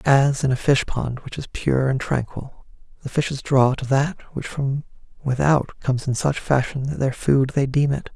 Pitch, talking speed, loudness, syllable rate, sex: 135 Hz, 205 wpm, -22 LUFS, 4.7 syllables/s, male